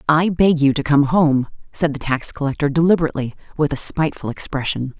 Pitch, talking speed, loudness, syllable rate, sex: 150 Hz, 180 wpm, -19 LUFS, 5.9 syllables/s, female